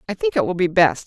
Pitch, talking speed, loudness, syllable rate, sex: 190 Hz, 340 wpm, -19 LUFS, 6.7 syllables/s, female